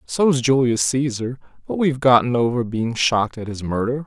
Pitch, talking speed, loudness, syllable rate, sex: 125 Hz, 175 wpm, -19 LUFS, 5.2 syllables/s, male